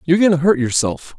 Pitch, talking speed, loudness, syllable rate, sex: 160 Hz, 255 wpm, -16 LUFS, 6.9 syllables/s, male